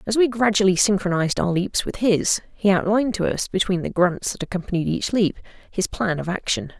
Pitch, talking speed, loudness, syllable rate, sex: 195 Hz, 205 wpm, -21 LUFS, 5.7 syllables/s, female